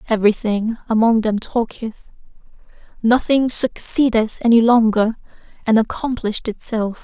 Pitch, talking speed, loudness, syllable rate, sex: 225 Hz, 95 wpm, -18 LUFS, 4.7 syllables/s, female